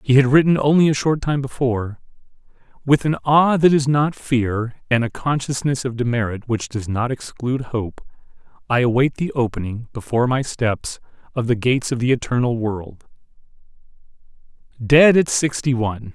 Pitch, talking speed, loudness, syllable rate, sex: 125 Hz, 160 wpm, -19 LUFS, 5.1 syllables/s, male